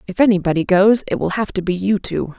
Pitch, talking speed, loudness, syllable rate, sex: 195 Hz, 250 wpm, -17 LUFS, 5.9 syllables/s, female